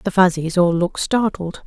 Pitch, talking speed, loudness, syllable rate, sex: 180 Hz, 180 wpm, -18 LUFS, 5.3 syllables/s, female